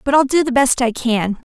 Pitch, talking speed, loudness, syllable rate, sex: 255 Hz, 275 wpm, -16 LUFS, 5.2 syllables/s, female